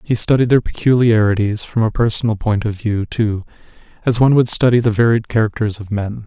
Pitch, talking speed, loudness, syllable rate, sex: 110 Hz, 190 wpm, -16 LUFS, 5.7 syllables/s, male